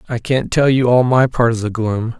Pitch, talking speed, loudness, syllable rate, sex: 120 Hz, 275 wpm, -15 LUFS, 5.0 syllables/s, male